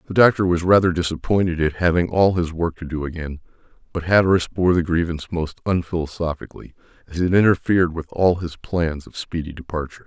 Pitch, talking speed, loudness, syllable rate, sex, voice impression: 85 Hz, 180 wpm, -20 LUFS, 6.1 syllables/s, male, very masculine, very adult-like, thick, cool, slightly calm, wild